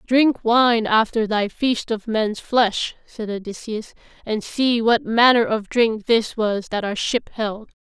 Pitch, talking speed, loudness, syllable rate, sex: 225 Hz, 170 wpm, -20 LUFS, 3.7 syllables/s, female